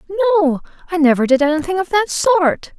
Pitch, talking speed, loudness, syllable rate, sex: 340 Hz, 175 wpm, -16 LUFS, 7.1 syllables/s, female